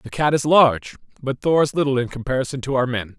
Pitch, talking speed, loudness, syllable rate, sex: 135 Hz, 245 wpm, -19 LUFS, 6.3 syllables/s, male